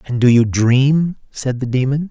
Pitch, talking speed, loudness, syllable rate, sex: 130 Hz, 200 wpm, -16 LUFS, 4.2 syllables/s, male